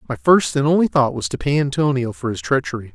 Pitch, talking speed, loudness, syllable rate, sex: 140 Hz, 245 wpm, -18 LUFS, 6.1 syllables/s, male